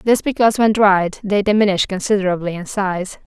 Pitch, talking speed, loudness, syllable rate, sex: 200 Hz, 160 wpm, -17 LUFS, 5.5 syllables/s, female